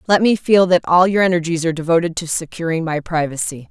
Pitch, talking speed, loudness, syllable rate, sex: 170 Hz, 210 wpm, -17 LUFS, 6.2 syllables/s, female